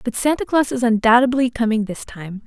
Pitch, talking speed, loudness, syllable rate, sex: 235 Hz, 195 wpm, -18 LUFS, 5.5 syllables/s, female